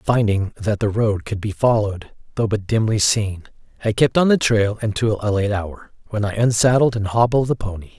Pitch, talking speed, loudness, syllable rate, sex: 110 Hz, 205 wpm, -19 LUFS, 5.2 syllables/s, male